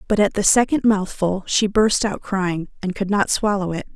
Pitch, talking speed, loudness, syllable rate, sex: 200 Hz, 210 wpm, -19 LUFS, 4.8 syllables/s, female